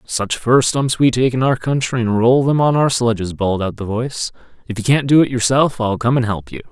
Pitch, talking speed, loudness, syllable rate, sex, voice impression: 125 Hz, 260 wpm, -16 LUFS, 5.5 syllables/s, male, masculine, adult-like, tensed, powerful, slightly bright, clear, slightly raspy, intellectual, calm, friendly, reassuring, wild, lively, kind, slightly intense